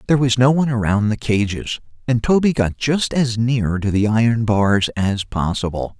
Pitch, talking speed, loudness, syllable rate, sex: 115 Hz, 190 wpm, -18 LUFS, 4.9 syllables/s, male